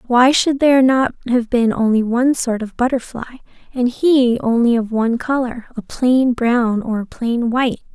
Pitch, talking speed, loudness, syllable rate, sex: 240 Hz, 180 wpm, -16 LUFS, 4.9 syllables/s, female